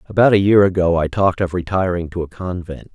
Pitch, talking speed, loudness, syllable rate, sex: 90 Hz, 225 wpm, -17 LUFS, 6.2 syllables/s, male